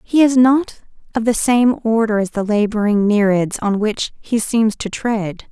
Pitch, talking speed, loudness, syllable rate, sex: 220 Hz, 185 wpm, -17 LUFS, 4.2 syllables/s, female